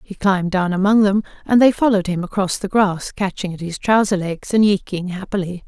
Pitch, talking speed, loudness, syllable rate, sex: 195 Hz, 210 wpm, -18 LUFS, 5.6 syllables/s, female